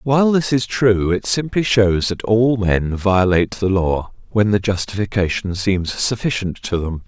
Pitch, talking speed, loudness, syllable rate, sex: 105 Hz, 170 wpm, -18 LUFS, 4.4 syllables/s, male